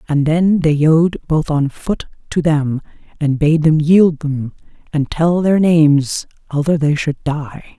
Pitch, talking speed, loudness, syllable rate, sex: 155 Hz, 170 wpm, -15 LUFS, 3.8 syllables/s, female